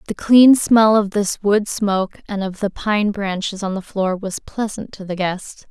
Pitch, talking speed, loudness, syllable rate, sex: 200 Hz, 210 wpm, -18 LUFS, 4.2 syllables/s, female